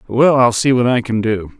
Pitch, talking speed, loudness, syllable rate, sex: 120 Hz, 265 wpm, -14 LUFS, 4.9 syllables/s, male